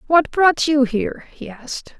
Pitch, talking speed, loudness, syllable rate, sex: 275 Hz, 180 wpm, -18 LUFS, 4.4 syllables/s, female